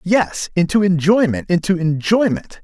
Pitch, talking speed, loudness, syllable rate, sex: 175 Hz, 115 wpm, -17 LUFS, 4.5 syllables/s, male